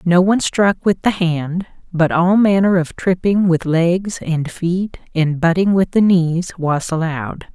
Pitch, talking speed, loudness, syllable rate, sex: 175 Hz, 175 wpm, -16 LUFS, 4.0 syllables/s, female